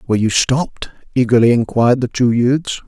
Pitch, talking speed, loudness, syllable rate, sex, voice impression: 120 Hz, 165 wpm, -15 LUFS, 5.8 syllables/s, male, very masculine, old, slightly thick, sincere, calm